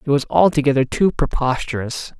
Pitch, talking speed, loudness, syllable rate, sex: 140 Hz, 135 wpm, -18 LUFS, 5.3 syllables/s, male